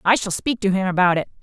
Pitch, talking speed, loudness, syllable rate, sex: 195 Hz, 295 wpm, -20 LUFS, 6.6 syllables/s, female